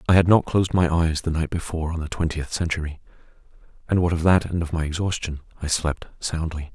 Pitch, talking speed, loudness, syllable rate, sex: 80 Hz, 215 wpm, -23 LUFS, 6.1 syllables/s, male